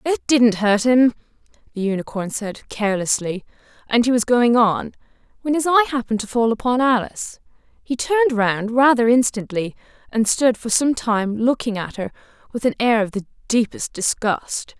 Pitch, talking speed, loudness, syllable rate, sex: 230 Hz, 165 wpm, -19 LUFS, 5.0 syllables/s, female